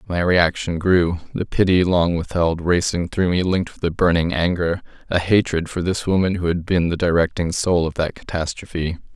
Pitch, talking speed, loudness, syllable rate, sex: 85 Hz, 190 wpm, -20 LUFS, 5.1 syllables/s, male